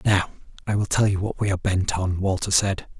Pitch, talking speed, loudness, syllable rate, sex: 100 Hz, 240 wpm, -23 LUFS, 5.7 syllables/s, male